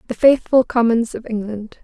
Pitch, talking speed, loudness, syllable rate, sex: 230 Hz, 165 wpm, -17 LUFS, 5.1 syllables/s, female